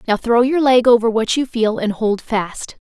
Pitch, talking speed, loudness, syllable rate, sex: 230 Hz, 230 wpm, -16 LUFS, 4.6 syllables/s, female